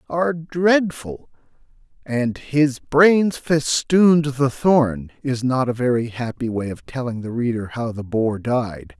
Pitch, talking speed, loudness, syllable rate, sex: 130 Hz, 145 wpm, -20 LUFS, 3.8 syllables/s, male